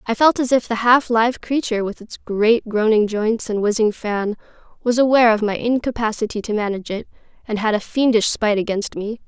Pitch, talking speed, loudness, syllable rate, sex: 225 Hz, 200 wpm, -19 LUFS, 5.6 syllables/s, female